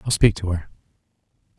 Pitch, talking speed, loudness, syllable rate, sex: 95 Hz, 150 wpm, -22 LUFS, 6.5 syllables/s, male